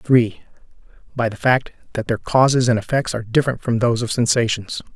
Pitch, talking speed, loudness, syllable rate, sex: 120 Hz, 180 wpm, -19 LUFS, 6.6 syllables/s, male